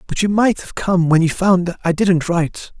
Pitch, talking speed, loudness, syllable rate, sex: 180 Hz, 235 wpm, -17 LUFS, 4.8 syllables/s, male